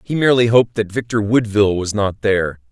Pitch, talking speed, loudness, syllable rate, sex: 110 Hz, 200 wpm, -16 LUFS, 6.3 syllables/s, male